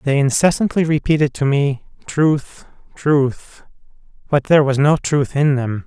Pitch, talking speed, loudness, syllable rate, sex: 145 Hz, 145 wpm, -17 LUFS, 4.3 syllables/s, male